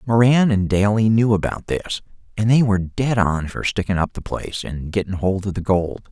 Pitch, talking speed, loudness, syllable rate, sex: 100 Hz, 215 wpm, -20 LUFS, 5.3 syllables/s, male